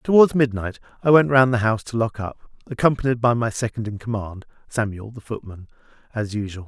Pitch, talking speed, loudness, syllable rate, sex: 115 Hz, 190 wpm, -21 LUFS, 5.6 syllables/s, male